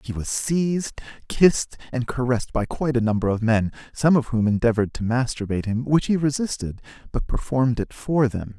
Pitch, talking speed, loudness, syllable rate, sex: 125 Hz, 190 wpm, -23 LUFS, 5.8 syllables/s, male